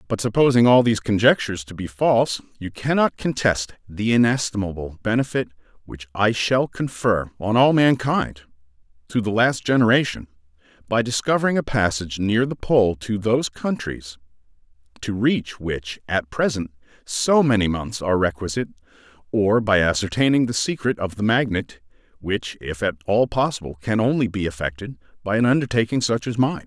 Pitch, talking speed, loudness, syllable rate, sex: 110 Hz, 155 wpm, -21 LUFS, 5.3 syllables/s, male